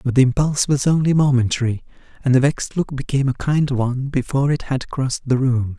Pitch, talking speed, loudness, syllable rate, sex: 135 Hz, 210 wpm, -19 LUFS, 6.2 syllables/s, male